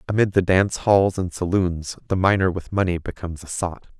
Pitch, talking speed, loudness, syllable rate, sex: 90 Hz, 195 wpm, -21 LUFS, 5.5 syllables/s, male